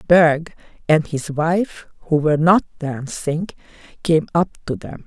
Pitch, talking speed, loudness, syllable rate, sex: 160 Hz, 140 wpm, -19 LUFS, 3.7 syllables/s, female